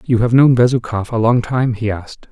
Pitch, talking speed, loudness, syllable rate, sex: 120 Hz, 235 wpm, -15 LUFS, 5.4 syllables/s, male